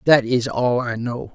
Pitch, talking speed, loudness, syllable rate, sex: 120 Hz, 225 wpm, -20 LUFS, 4.1 syllables/s, male